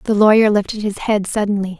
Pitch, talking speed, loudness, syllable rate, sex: 205 Hz, 200 wpm, -16 LUFS, 6.1 syllables/s, female